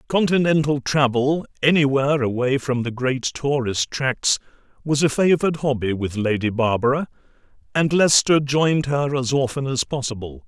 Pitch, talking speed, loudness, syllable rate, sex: 135 Hz, 140 wpm, -20 LUFS, 4.9 syllables/s, male